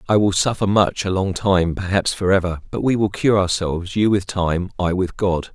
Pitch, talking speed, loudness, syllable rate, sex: 95 Hz, 215 wpm, -19 LUFS, 5.0 syllables/s, male